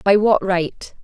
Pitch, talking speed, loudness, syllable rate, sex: 195 Hz, 175 wpm, -18 LUFS, 3.4 syllables/s, female